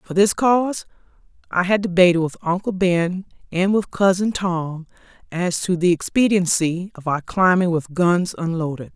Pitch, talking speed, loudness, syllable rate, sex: 180 Hz, 155 wpm, -19 LUFS, 4.6 syllables/s, female